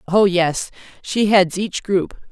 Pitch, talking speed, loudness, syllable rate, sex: 190 Hz, 155 wpm, -18 LUFS, 3.4 syllables/s, female